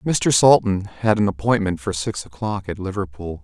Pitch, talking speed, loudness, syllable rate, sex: 100 Hz, 175 wpm, -20 LUFS, 4.7 syllables/s, male